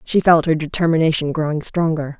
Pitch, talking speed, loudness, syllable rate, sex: 160 Hz, 165 wpm, -18 LUFS, 5.7 syllables/s, female